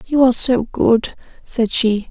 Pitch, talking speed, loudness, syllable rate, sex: 240 Hz, 170 wpm, -16 LUFS, 4.1 syllables/s, female